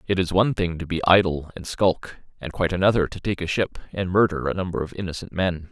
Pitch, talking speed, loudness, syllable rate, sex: 90 Hz, 240 wpm, -23 LUFS, 6.2 syllables/s, male